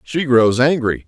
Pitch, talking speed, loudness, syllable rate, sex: 130 Hz, 165 wpm, -15 LUFS, 4.1 syllables/s, male